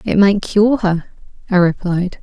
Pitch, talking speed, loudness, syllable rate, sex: 195 Hz, 160 wpm, -15 LUFS, 4.0 syllables/s, female